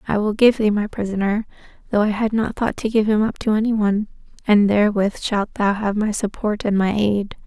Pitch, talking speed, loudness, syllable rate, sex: 210 Hz, 225 wpm, -19 LUFS, 5.5 syllables/s, female